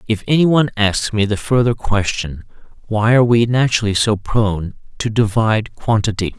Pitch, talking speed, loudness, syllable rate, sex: 110 Hz, 150 wpm, -16 LUFS, 5.3 syllables/s, male